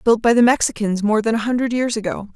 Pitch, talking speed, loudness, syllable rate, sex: 225 Hz, 255 wpm, -18 LUFS, 6.3 syllables/s, female